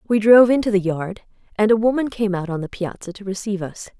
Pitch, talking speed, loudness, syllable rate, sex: 205 Hz, 240 wpm, -19 LUFS, 6.2 syllables/s, female